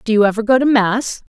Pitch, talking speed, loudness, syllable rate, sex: 225 Hz, 270 wpm, -15 LUFS, 6.0 syllables/s, female